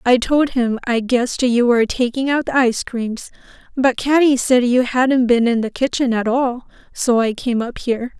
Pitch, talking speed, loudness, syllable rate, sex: 245 Hz, 205 wpm, -17 LUFS, 4.8 syllables/s, female